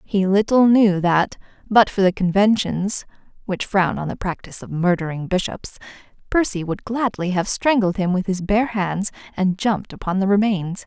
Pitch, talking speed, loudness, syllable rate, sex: 195 Hz, 170 wpm, -20 LUFS, 3.8 syllables/s, female